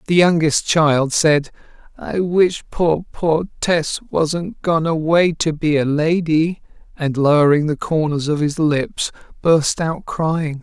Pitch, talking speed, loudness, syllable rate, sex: 155 Hz, 145 wpm, -18 LUFS, 3.5 syllables/s, male